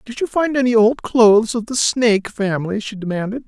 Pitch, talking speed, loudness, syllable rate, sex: 225 Hz, 205 wpm, -17 LUFS, 5.6 syllables/s, male